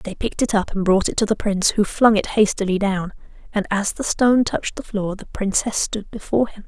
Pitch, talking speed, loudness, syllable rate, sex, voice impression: 205 Hz, 245 wpm, -20 LUFS, 5.8 syllables/s, female, feminine, slightly young, slightly dark, slightly muffled, fluent, slightly cute, calm, slightly friendly, kind